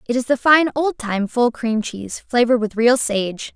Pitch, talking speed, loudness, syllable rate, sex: 235 Hz, 220 wpm, -18 LUFS, 4.8 syllables/s, female